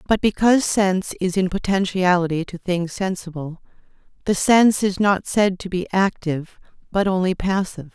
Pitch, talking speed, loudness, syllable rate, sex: 185 Hz, 150 wpm, -20 LUFS, 5.2 syllables/s, female